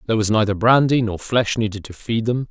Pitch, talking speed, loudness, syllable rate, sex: 110 Hz, 240 wpm, -19 LUFS, 6.0 syllables/s, male